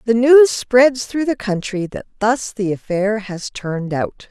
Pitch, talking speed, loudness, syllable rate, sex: 220 Hz, 180 wpm, -17 LUFS, 4.0 syllables/s, female